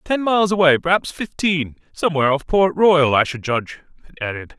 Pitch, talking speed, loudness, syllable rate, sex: 160 Hz, 170 wpm, -18 LUFS, 5.6 syllables/s, male